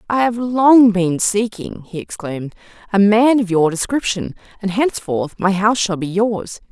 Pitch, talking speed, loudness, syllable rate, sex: 205 Hz, 170 wpm, -16 LUFS, 4.7 syllables/s, female